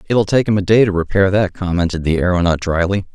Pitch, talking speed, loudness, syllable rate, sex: 95 Hz, 230 wpm, -16 LUFS, 6.2 syllables/s, male